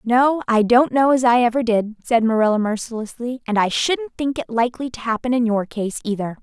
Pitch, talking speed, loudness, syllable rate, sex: 235 Hz, 215 wpm, -19 LUFS, 5.4 syllables/s, female